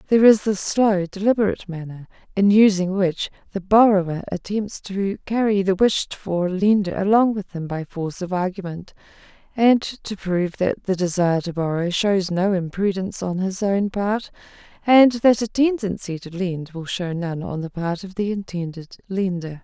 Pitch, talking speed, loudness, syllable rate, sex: 190 Hz, 170 wpm, -21 LUFS, 4.8 syllables/s, female